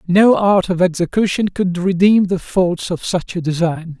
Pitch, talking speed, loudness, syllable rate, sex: 180 Hz, 180 wpm, -16 LUFS, 4.4 syllables/s, male